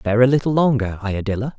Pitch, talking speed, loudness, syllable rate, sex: 120 Hz, 190 wpm, -19 LUFS, 6.7 syllables/s, male